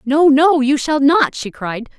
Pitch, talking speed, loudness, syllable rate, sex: 280 Hz, 210 wpm, -14 LUFS, 3.8 syllables/s, female